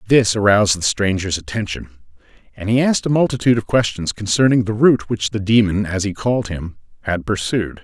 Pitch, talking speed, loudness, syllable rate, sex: 105 Hz, 185 wpm, -17 LUFS, 6.0 syllables/s, male